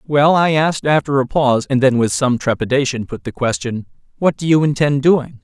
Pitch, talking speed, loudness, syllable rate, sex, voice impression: 135 Hz, 210 wpm, -16 LUFS, 5.4 syllables/s, male, very masculine, very adult-like, middle-aged, thick, tensed, powerful, bright, slightly hard, very clear, fluent, cool, very intellectual, very refreshing, sincere, calm, mature, very friendly, reassuring, very unique, slightly elegant, wild, slightly sweet, very lively, very kind, very modest